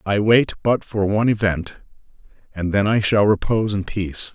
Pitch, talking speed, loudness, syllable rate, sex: 100 Hz, 180 wpm, -19 LUFS, 5.3 syllables/s, male